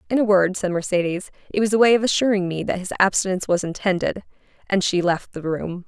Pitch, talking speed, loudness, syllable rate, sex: 190 Hz, 225 wpm, -21 LUFS, 6.2 syllables/s, female